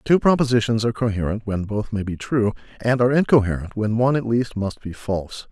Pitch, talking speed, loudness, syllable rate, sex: 110 Hz, 205 wpm, -21 LUFS, 6.1 syllables/s, male